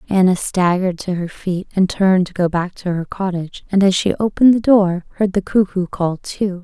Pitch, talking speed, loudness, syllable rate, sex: 185 Hz, 215 wpm, -17 LUFS, 5.4 syllables/s, female